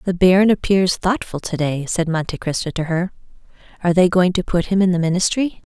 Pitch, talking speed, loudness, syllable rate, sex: 180 Hz, 210 wpm, -18 LUFS, 5.8 syllables/s, female